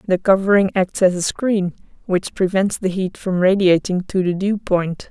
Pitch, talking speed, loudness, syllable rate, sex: 190 Hz, 190 wpm, -18 LUFS, 4.6 syllables/s, female